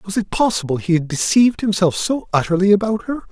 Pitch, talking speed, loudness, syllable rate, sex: 200 Hz, 200 wpm, -17 LUFS, 5.9 syllables/s, male